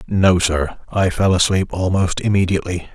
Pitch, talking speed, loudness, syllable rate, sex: 90 Hz, 145 wpm, -18 LUFS, 4.9 syllables/s, male